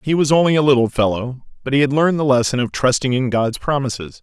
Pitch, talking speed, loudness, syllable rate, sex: 130 Hz, 240 wpm, -17 LUFS, 6.3 syllables/s, male